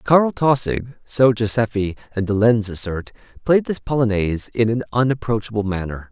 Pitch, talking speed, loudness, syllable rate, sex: 115 Hz, 145 wpm, -19 LUFS, 5.1 syllables/s, male